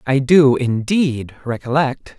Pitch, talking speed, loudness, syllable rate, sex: 135 Hz, 110 wpm, -17 LUFS, 3.5 syllables/s, male